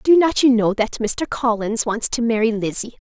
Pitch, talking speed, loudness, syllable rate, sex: 230 Hz, 215 wpm, -19 LUFS, 4.7 syllables/s, female